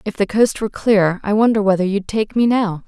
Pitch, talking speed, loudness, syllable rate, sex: 205 Hz, 250 wpm, -17 LUFS, 5.5 syllables/s, female